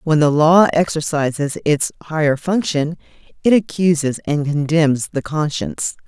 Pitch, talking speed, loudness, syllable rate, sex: 155 Hz, 130 wpm, -17 LUFS, 4.5 syllables/s, female